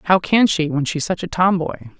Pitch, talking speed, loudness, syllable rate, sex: 170 Hz, 240 wpm, -18 LUFS, 5.2 syllables/s, female